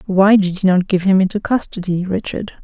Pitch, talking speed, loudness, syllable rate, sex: 190 Hz, 205 wpm, -16 LUFS, 5.4 syllables/s, female